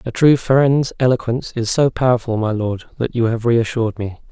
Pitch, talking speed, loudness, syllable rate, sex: 120 Hz, 195 wpm, -17 LUFS, 5.4 syllables/s, male